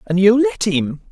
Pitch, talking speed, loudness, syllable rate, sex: 205 Hz, 215 wpm, -16 LUFS, 4.3 syllables/s, male